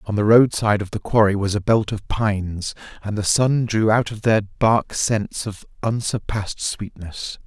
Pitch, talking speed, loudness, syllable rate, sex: 105 Hz, 195 wpm, -20 LUFS, 4.4 syllables/s, male